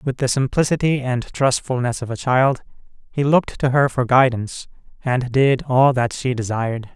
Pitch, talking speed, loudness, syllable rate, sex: 130 Hz, 175 wpm, -19 LUFS, 5.0 syllables/s, male